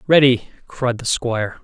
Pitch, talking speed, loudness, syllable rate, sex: 125 Hz, 145 wpm, -18 LUFS, 4.7 syllables/s, male